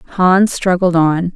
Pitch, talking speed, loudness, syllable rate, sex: 180 Hz, 135 wpm, -13 LUFS, 3.1 syllables/s, female